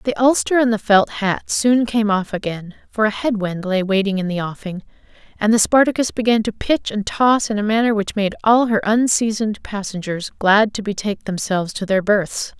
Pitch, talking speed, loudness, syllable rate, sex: 210 Hz, 205 wpm, -18 LUFS, 5.2 syllables/s, female